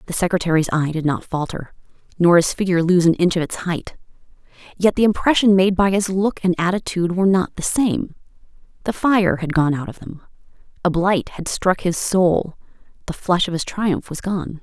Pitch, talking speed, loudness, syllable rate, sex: 180 Hz, 195 wpm, -19 LUFS, 5.3 syllables/s, female